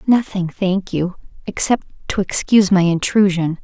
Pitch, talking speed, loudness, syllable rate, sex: 190 Hz, 115 wpm, -17 LUFS, 4.7 syllables/s, female